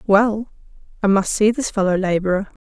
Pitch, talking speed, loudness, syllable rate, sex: 205 Hz, 160 wpm, -19 LUFS, 5.3 syllables/s, female